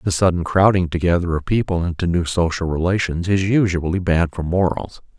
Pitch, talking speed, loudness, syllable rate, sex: 90 Hz, 175 wpm, -19 LUFS, 5.5 syllables/s, male